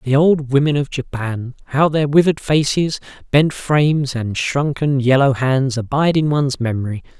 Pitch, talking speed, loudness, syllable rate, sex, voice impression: 140 Hz, 150 wpm, -17 LUFS, 5.0 syllables/s, male, masculine, very adult-like, slightly muffled, slightly calm, slightly elegant, slightly kind